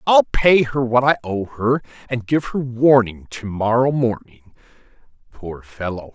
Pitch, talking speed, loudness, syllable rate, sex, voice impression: 120 Hz, 155 wpm, -18 LUFS, 4.1 syllables/s, male, very masculine, middle-aged, thick, tensed, slightly powerful, bright, slightly soft, clear, fluent, slightly cool, very intellectual, refreshing, very sincere, slightly calm, friendly, reassuring, unique, slightly elegant, wild, slightly sweet, lively, kind, slightly intense